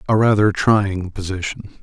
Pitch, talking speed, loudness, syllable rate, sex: 100 Hz, 130 wpm, -18 LUFS, 4.7 syllables/s, male